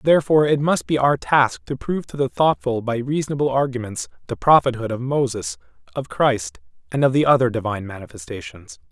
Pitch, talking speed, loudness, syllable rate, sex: 130 Hz, 175 wpm, -20 LUFS, 5.9 syllables/s, male